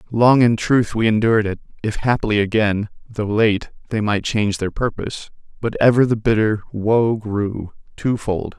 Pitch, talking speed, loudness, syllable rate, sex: 110 Hz, 160 wpm, -19 LUFS, 4.6 syllables/s, male